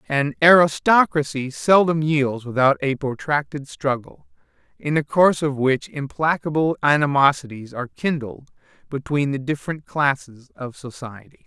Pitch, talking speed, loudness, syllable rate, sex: 145 Hz, 120 wpm, -20 LUFS, 4.7 syllables/s, male